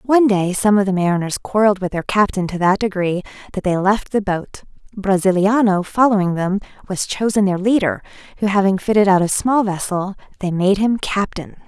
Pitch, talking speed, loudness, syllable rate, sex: 195 Hz, 185 wpm, -17 LUFS, 5.4 syllables/s, female